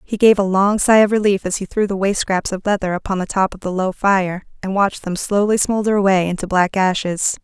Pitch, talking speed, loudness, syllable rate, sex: 195 Hz, 250 wpm, -17 LUFS, 5.8 syllables/s, female